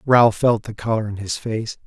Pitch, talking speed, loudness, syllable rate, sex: 110 Hz, 225 wpm, -20 LUFS, 4.7 syllables/s, male